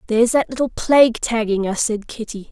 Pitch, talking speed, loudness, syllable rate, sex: 230 Hz, 190 wpm, -18 LUFS, 5.6 syllables/s, female